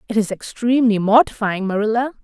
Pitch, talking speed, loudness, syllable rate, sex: 220 Hz, 135 wpm, -18 LUFS, 6.1 syllables/s, female